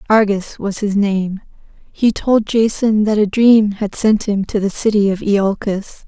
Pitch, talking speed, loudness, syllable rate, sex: 205 Hz, 180 wpm, -16 LUFS, 4.2 syllables/s, female